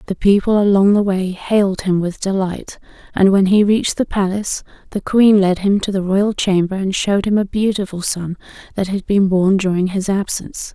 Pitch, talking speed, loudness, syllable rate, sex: 195 Hz, 200 wpm, -16 LUFS, 5.2 syllables/s, female